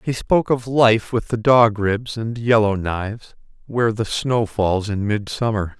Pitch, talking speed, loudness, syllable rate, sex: 110 Hz, 175 wpm, -19 LUFS, 4.3 syllables/s, male